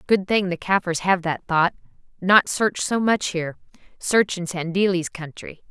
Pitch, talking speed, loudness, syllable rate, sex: 185 Hz, 170 wpm, -21 LUFS, 4.6 syllables/s, female